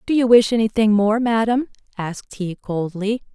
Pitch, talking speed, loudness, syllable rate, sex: 215 Hz, 160 wpm, -19 LUFS, 5.2 syllables/s, female